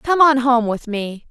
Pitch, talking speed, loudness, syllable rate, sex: 250 Hz, 230 wpm, -17 LUFS, 4.0 syllables/s, female